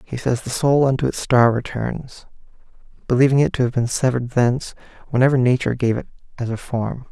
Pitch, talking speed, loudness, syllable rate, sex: 125 Hz, 185 wpm, -19 LUFS, 6.0 syllables/s, male